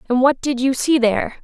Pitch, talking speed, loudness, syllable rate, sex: 260 Hz, 250 wpm, -17 LUFS, 5.8 syllables/s, female